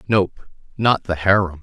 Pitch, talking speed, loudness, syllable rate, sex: 95 Hz, 150 wpm, -19 LUFS, 4.2 syllables/s, male